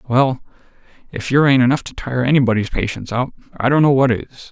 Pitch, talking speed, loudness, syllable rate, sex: 130 Hz, 200 wpm, -17 LUFS, 5.8 syllables/s, male